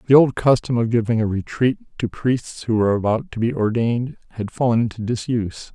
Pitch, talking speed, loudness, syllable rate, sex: 115 Hz, 200 wpm, -20 LUFS, 5.7 syllables/s, male